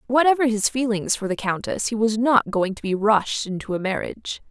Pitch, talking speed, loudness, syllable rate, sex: 220 Hz, 215 wpm, -22 LUFS, 5.4 syllables/s, female